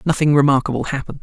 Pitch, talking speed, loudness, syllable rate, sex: 140 Hz, 145 wpm, -17 LUFS, 8.0 syllables/s, male